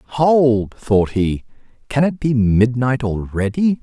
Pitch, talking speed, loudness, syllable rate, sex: 120 Hz, 125 wpm, -17 LUFS, 3.3 syllables/s, male